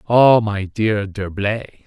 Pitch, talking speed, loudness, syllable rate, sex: 105 Hz, 130 wpm, -18 LUFS, 3.0 syllables/s, male